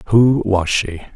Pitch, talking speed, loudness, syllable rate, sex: 105 Hz, 155 wpm, -16 LUFS, 3.9 syllables/s, male